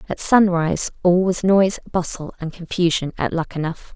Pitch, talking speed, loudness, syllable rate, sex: 175 Hz, 150 wpm, -19 LUFS, 5.3 syllables/s, female